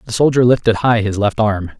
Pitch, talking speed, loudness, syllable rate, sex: 110 Hz, 235 wpm, -15 LUFS, 5.6 syllables/s, male